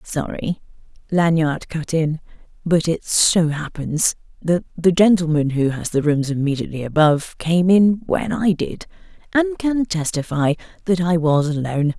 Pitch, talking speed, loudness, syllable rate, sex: 165 Hz, 145 wpm, -19 LUFS, 4.5 syllables/s, female